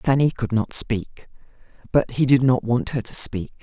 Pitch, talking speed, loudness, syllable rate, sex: 120 Hz, 200 wpm, -20 LUFS, 4.5 syllables/s, female